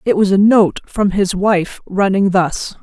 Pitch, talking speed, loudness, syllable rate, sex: 195 Hz, 190 wpm, -14 LUFS, 3.9 syllables/s, female